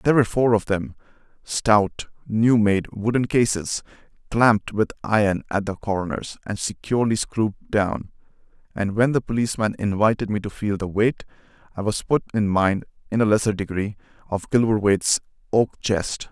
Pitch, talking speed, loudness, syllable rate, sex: 105 Hz, 155 wpm, -22 LUFS, 5.1 syllables/s, male